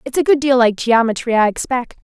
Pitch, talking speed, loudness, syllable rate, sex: 245 Hz, 220 wpm, -15 LUFS, 5.8 syllables/s, female